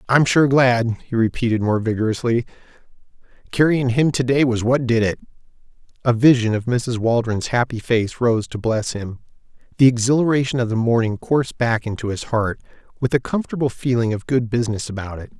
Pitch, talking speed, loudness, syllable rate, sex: 120 Hz, 175 wpm, -19 LUFS, 5.6 syllables/s, male